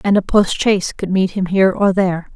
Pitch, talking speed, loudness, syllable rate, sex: 190 Hz, 230 wpm, -16 LUFS, 5.9 syllables/s, female